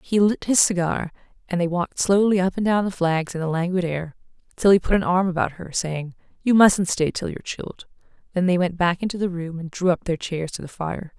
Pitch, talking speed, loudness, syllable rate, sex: 180 Hz, 245 wpm, -22 LUFS, 5.7 syllables/s, female